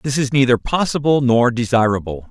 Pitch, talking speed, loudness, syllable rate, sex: 125 Hz, 155 wpm, -16 LUFS, 5.3 syllables/s, male